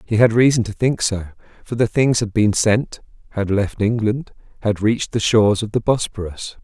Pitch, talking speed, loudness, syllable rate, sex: 110 Hz, 200 wpm, -18 LUFS, 5.1 syllables/s, male